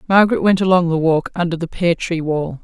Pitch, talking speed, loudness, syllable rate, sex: 170 Hz, 225 wpm, -17 LUFS, 5.8 syllables/s, female